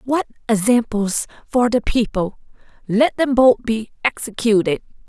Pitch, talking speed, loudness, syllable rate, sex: 230 Hz, 120 wpm, -19 LUFS, 4.2 syllables/s, female